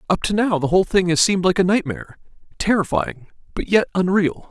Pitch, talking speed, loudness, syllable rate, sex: 185 Hz, 185 wpm, -19 LUFS, 6.1 syllables/s, male